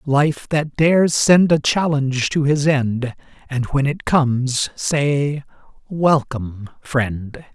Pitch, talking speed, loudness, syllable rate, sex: 140 Hz, 125 wpm, -18 LUFS, 3.4 syllables/s, male